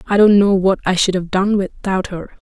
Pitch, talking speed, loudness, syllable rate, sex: 190 Hz, 245 wpm, -15 LUFS, 5.1 syllables/s, female